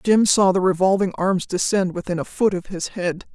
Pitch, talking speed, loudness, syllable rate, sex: 190 Hz, 215 wpm, -20 LUFS, 5.0 syllables/s, female